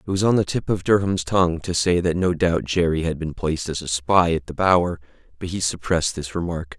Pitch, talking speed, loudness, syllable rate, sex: 85 Hz, 250 wpm, -21 LUFS, 5.7 syllables/s, male